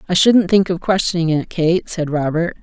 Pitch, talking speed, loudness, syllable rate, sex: 170 Hz, 205 wpm, -16 LUFS, 5.0 syllables/s, female